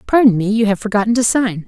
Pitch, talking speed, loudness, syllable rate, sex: 215 Hz, 250 wpm, -15 LUFS, 6.5 syllables/s, female